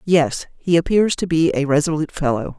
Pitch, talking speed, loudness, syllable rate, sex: 160 Hz, 185 wpm, -19 LUFS, 5.5 syllables/s, female